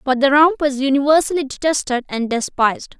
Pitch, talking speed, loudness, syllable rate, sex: 275 Hz, 160 wpm, -17 LUFS, 5.6 syllables/s, female